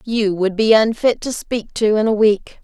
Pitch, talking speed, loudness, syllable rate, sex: 215 Hz, 230 wpm, -17 LUFS, 4.4 syllables/s, female